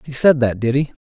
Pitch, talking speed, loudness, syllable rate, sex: 130 Hz, 290 wpm, -17 LUFS, 5.9 syllables/s, male